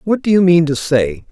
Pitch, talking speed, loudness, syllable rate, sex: 160 Hz, 275 wpm, -14 LUFS, 5.0 syllables/s, male